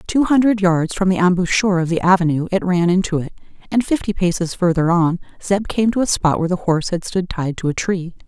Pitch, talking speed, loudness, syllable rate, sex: 180 Hz, 230 wpm, -18 LUFS, 5.9 syllables/s, female